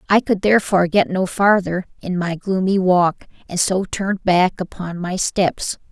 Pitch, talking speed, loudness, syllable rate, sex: 185 Hz, 170 wpm, -18 LUFS, 4.6 syllables/s, female